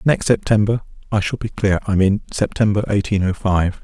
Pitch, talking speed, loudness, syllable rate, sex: 100 Hz, 190 wpm, -19 LUFS, 5.2 syllables/s, male